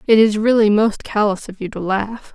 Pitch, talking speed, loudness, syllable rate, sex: 210 Hz, 230 wpm, -17 LUFS, 5.0 syllables/s, female